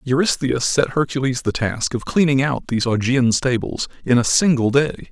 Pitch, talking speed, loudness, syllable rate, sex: 130 Hz, 175 wpm, -19 LUFS, 5.1 syllables/s, male